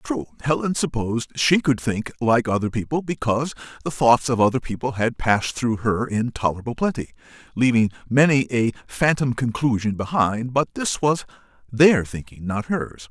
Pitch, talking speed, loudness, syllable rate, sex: 125 Hz, 155 wpm, -21 LUFS, 4.9 syllables/s, male